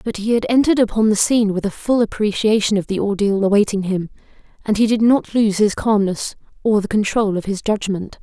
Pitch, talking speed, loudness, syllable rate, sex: 210 Hz, 210 wpm, -18 LUFS, 5.7 syllables/s, female